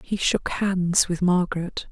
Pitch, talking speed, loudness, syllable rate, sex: 180 Hz, 155 wpm, -23 LUFS, 3.9 syllables/s, female